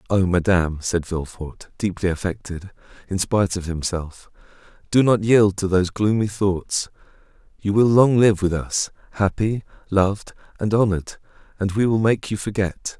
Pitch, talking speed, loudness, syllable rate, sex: 95 Hz, 150 wpm, -21 LUFS, 4.9 syllables/s, male